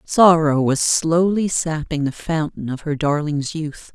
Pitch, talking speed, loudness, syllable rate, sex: 155 Hz, 150 wpm, -19 LUFS, 3.9 syllables/s, female